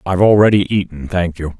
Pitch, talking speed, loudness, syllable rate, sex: 90 Hz, 190 wpm, -14 LUFS, 6.2 syllables/s, male